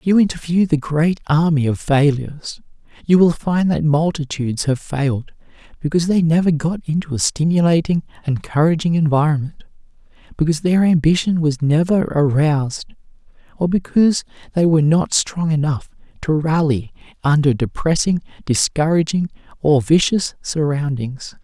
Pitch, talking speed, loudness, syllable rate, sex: 155 Hz, 125 wpm, -18 LUFS, 5.0 syllables/s, male